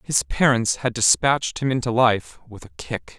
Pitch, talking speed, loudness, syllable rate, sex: 120 Hz, 190 wpm, -20 LUFS, 4.8 syllables/s, male